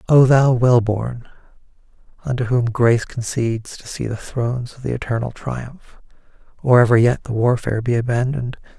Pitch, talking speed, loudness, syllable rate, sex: 120 Hz, 155 wpm, -19 LUFS, 5.4 syllables/s, male